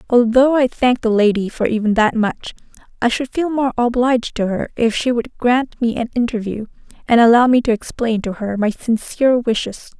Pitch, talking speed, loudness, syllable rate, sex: 235 Hz, 200 wpm, -17 LUFS, 5.1 syllables/s, female